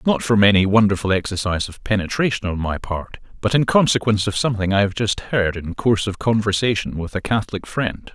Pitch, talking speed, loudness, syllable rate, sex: 105 Hz, 200 wpm, -19 LUFS, 6.0 syllables/s, male